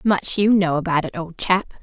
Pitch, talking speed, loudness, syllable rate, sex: 180 Hz, 230 wpm, -20 LUFS, 5.0 syllables/s, female